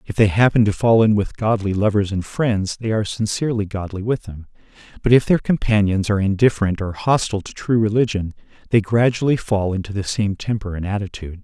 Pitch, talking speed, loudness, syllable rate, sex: 105 Hz, 195 wpm, -19 LUFS, 6.0 syllables/s, male